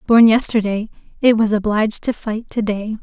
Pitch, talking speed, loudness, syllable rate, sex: 220 Hz, 180 wpm, -17 LUFS, 5.1 syllables/s, female